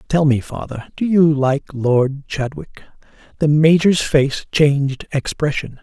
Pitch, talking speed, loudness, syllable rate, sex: 145 Hz, 135 wpm, -17 LUFS, 4.0 syllables/s, male